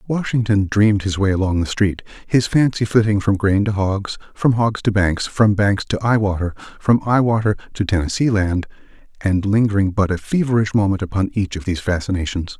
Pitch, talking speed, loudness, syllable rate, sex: 100 Hz, 190 wpm, -18 LUFS, 5.5 syllables/s, male